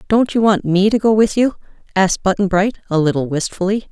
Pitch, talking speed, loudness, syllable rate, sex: 195 Hz, 215 wpm, -16 LUFS, 5.9 syllables/s, female